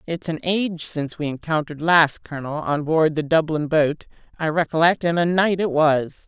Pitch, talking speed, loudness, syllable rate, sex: 160 Hz, 190 wpm, -21 LUFS, 5.2 syllables/s, female